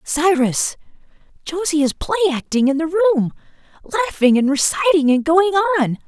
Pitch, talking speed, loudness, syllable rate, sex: 320 Hz, 140 wpm, -17 LUFS, 5.0 syllables/s, female